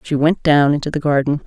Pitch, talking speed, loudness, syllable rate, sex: 150 Hz, 245 wpm, -16 LUFS, 5.9 syllables/s, female